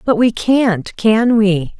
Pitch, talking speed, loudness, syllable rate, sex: 215 Hz, 135 wpm, -14 LUFS, 3.0 syllables/s, female